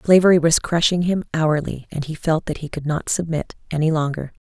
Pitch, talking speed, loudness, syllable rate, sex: 160 Hz, 205 wpm, -20 LUFS, 5.5 syllables/s, female